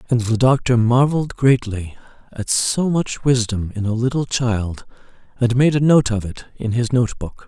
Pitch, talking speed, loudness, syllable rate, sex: 120 Hz, 185 wpm, -18 LUFS, 4.6 syllables/s, male